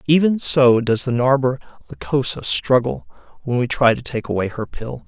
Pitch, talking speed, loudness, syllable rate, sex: 130 Hz, 175 wpm, -18 LUFS, 4.8 syllables/s, male